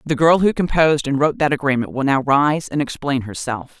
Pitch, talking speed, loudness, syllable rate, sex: 140 Hz, 220 wpm, -18 LUFS, 5.7 syllables/s, female